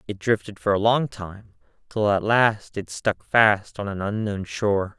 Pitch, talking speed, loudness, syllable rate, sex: 105 Hz, 190 wpm, -23 LUFS, 4.3 syllables/s, male